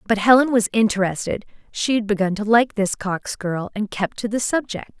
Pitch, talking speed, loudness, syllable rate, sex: 215 Hz, 205 wpm, -20 LUFS, 5.2 syllables/s, female